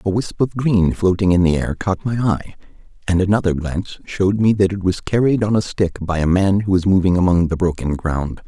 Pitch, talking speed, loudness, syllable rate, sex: 95 Hz, 235 wpm, -18 LUFS, 5.5 syllables/s, male